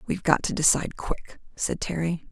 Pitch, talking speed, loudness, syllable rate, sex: 165 Hz, 180 wpm, -25 LUFS, 5.6 syllables/s, female